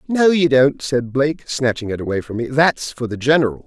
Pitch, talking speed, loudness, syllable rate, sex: 135 Hz, 230 wpm, -18 LUFS, 5.4 syllables/s, male